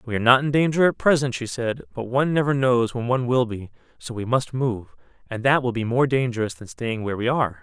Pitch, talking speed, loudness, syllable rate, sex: 120 Hz, 250 wpm, -22 LUFS, 6.2 syllables/s, male